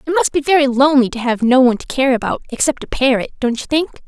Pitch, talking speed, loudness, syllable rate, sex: 270 Hz, 265 wpm, -15 LUFS, 7.1 syllables/s, female